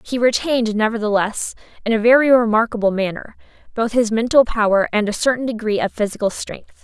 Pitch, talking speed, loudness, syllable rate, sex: 225 Hz, 165 wpm, -18 LUFS, 5.8 syllables/s, female